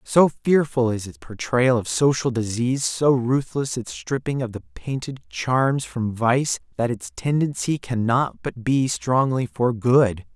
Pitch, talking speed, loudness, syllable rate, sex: 125 Hz, 155 wpm, -22 LUFS, 4.0 syllables/s, male